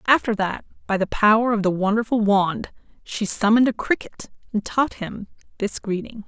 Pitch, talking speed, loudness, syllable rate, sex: 215 Hz, 170 wpm, -21 LUFS, 5.3 syllables/s, female